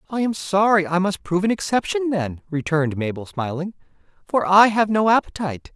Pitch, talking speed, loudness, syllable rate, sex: 185 Hz, 175 wpm, -20 LUFS, 5.8 syllables/s, male